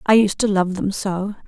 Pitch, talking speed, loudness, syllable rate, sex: 195 Hz, 245 wpm, -20 LUFS, 4.8 syllables/s, female